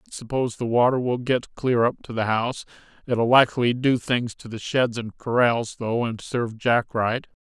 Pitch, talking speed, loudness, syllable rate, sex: 120 Hz, 210 wpm, -23 LUFS, 5.4 syllables/s, male